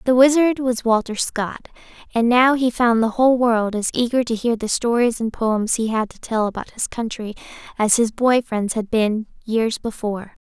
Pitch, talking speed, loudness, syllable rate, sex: 230 Hz, 200 wpm, -19 LUFS, 4.8 syllables/s, female